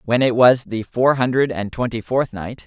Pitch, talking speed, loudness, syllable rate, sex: 120 Hz, 225 wpm, -18 LUFS, 4.7 syllables/s, male